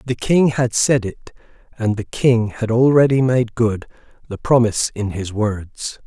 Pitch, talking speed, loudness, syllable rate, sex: 115 Hz, 170 wpm, -18 LUFS, 4.3 syllables/s, male